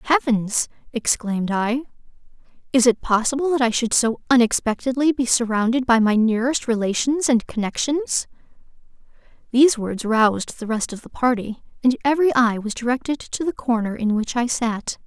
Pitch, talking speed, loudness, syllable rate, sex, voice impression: 240 Hz, 155 wpm, -20 LUFS, 5.2 syllables/s, female, feminine, adult-like, tensed, powerful, slightly bright, clear, fluent, intellectual, friendly, elegant, lively